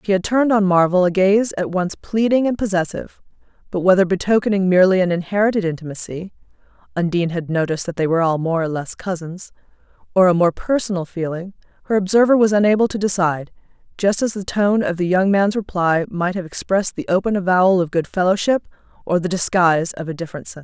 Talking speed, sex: 190 wpm, female